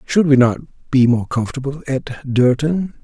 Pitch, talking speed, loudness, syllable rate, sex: 135 Hz, 160 wpm, -17 LUFS, 4.2 syllables/s, male